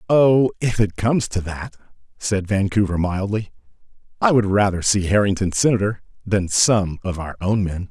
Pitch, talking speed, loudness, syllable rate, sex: 100 Hz, 160 wpm, -20 LUFS, 4.8 syllables/s, male